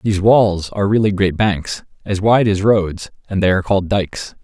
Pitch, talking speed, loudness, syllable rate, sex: 100 Hz, 205 wpm, -16 LUFS, 5.4 syllables/s, male